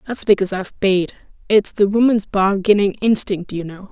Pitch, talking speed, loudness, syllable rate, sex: 200 Hz, 170 wpm, -17 LUFS, 5.4 syllables/s, female